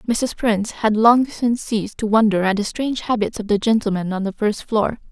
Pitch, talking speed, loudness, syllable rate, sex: 215 Hz, 225 wpm, -19 LUFS, 5.5 syllables/s, female